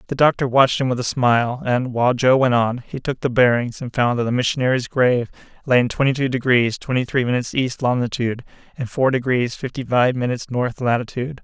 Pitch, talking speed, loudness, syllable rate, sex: 125 Hz, 210 wpm, -19 LUFS, 6.1 syllables/s, male